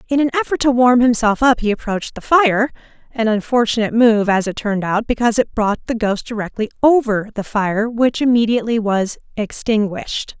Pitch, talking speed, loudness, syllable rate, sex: 230 Hz, 180 wpm, -17 LUFS, 5.6 syllables/s, female